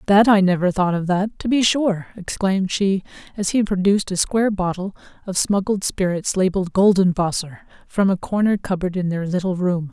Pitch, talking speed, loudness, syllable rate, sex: 190 Hz, 190 wpm, -20 LUFS, 5.4 syllables/s, female